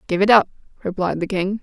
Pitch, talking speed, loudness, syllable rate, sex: 195 Hz, 220 wpm, -18 LUFS, 6.2 syllables/s, female